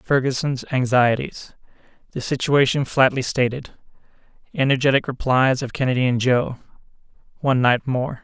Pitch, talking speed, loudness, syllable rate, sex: 130 Hz, 85 wpm, -20 LUFS, 5.1 syllables/s, male